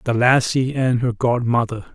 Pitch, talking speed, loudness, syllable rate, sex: 125 Hz, 155 wpm, -19 LUFS, 4.6 syllables/s, male